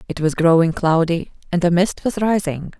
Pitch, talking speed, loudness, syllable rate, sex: 175 Hz, 195 wpm, -18 LUFS, 5.1 syllables/s, female